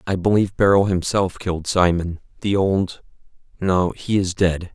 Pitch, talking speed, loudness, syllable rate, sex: 95 Hz, 125 wpm, -20 LUFS, 4.8 syllables/s, male